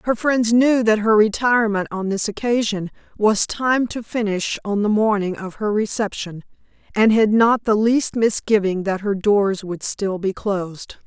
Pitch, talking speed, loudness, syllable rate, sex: 210 Hz, 175 wpm, -19 LUFS, 4.5 syllables/s, female